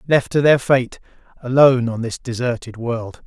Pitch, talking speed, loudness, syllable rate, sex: 125 Hz, 165 wpm, -18 LUFS, 4.9 syllables/s, male